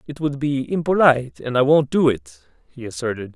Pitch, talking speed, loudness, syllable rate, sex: 130 Hz, 195 wpm, -19 LUFS, 5.4 syllables/s, male